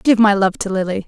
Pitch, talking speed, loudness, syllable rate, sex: 200 Hz, 280 wpm, -16 LUFS, 4.9 syllables/s, female